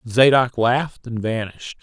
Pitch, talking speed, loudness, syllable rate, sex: 120 Hz, 130 wpm, -19 LUFS, 4.8 syllables/s, male